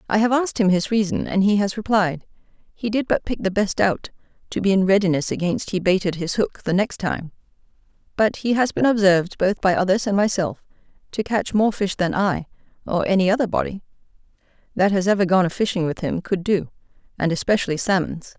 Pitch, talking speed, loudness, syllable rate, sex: 195 Hz, 200 wpm, -21 LUFS, 5.7 syllables/s, female